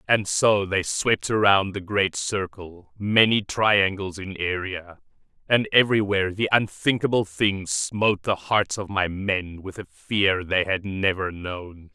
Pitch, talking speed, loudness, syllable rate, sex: 95 Hz, 150 wpm, -22 LUFS, 4.0 syllables/s, male